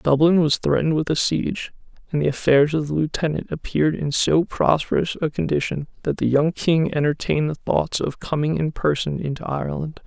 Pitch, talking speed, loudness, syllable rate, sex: 150 Hz, 180 wpm, -21 LUFS, 5.4 syllables/s, male